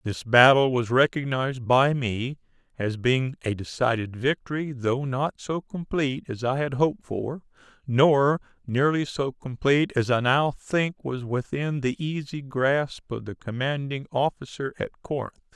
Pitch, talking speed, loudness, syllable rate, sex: 135 Hz, 150 wpm, -25 LUFS, 4.3 syllables/s, male